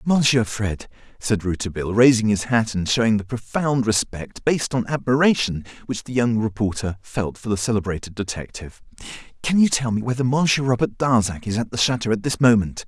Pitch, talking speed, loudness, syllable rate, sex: 115 Hz, 180 wpm, -21 LUFS, 5.7 syllables/s, male